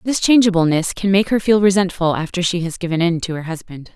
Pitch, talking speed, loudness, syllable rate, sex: 180 Hz, 230 wpm, -17 LUFS, 6.0 syllables/s, female